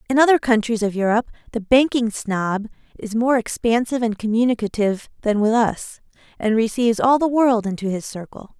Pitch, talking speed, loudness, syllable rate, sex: 230 Hz, 170 wpm, -19 LUFS, 5.6 syllables/s, female